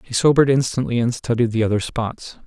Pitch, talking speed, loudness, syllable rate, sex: 120 Hz, 195 wpm, -19 LUFS, 6.0 syllables/s, male